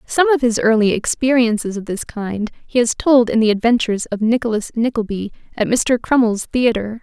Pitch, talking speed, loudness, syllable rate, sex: 230 Hz, 180 wpm, -17 LUFS, 5.2 syllables/s, female